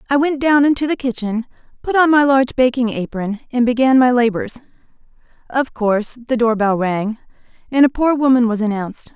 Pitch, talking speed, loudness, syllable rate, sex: 245 Hz, 185 wpm, -16 LUFS, 5.6 syllables/s, female